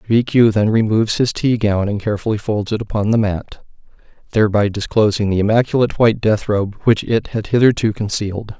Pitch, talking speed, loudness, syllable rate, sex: 110 Hz, 175 wpm, -17 LUFS, 5.9 syllables/s, male